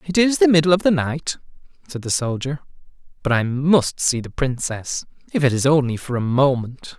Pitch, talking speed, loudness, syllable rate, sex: 145 Hz, 200 wpm, -19 LUFS, 5.0 syllables/s, male